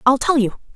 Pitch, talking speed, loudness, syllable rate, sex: 260 Hz, 240 wpm, -18 LUFS, 5.9 syllables/s, female